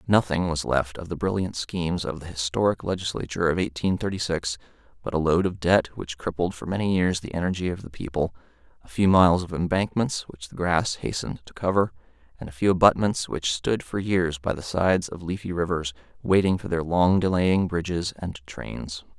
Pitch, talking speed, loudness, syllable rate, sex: 90 Hz, 195 wpm, -25 LUFS, 5.4 syllables/s, male